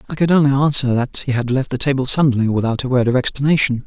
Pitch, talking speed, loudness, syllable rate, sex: 130 Hz, 250 wpm, -16 LUFS, 6.8 syllables/s, male